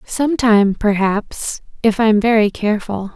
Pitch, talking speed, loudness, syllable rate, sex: 215 Hz, 95 wpm, -16 LUFS, 4.6 syllables/s, female